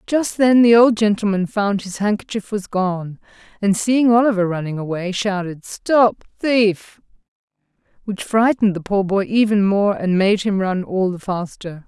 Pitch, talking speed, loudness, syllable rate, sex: 200 Hz, 160 wpm, -18 LUFS, 4.4 syllables/s, female